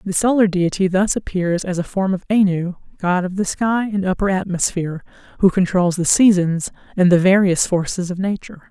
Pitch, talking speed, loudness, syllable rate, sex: 185 Hz, 185 wpm, -18 LUFS, 5.4 syllables/s, female